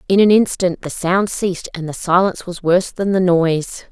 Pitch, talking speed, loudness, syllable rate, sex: 180 Hz, 215 wpm, -17 LUFS, 5.5 syllables/s, female